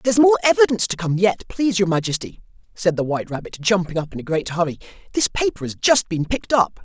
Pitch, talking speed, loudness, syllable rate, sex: 195 Hz, 230 wpm, -20 LUFS, 6.5 syllables/s, male